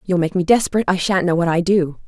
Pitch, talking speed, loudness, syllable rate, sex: 180 Hz, 290 wpm, -17 LUFS, 6.9 syllables/s, female